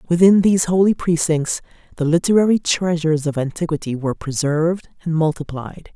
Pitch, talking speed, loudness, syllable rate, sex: 165 Hz, 130 wpm, -18 LUFS, 5.7 syllables/s, female